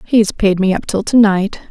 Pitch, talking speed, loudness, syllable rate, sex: 200 Hz, 245 wpm, -14 LUFS, 4.6 syllables/s, female